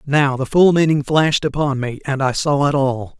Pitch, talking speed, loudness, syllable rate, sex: 140 Hz, 225 wpm, -17 LUFS, 4.9 syllables/s, male